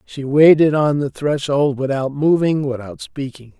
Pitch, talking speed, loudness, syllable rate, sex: 140 Hz, 150 wpm, -17 LUFS, 4.3 syllables/s, male